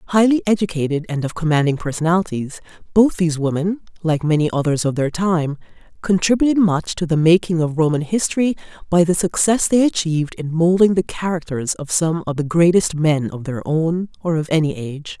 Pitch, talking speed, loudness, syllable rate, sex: 165 Hz, 180 wpm, -18 LUFS, 5.6 syllables/s, female